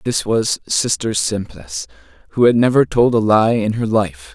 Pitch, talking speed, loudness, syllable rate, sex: 105 Hz, 180 wpm, -16 LUFS, 4.6 syllables/s, male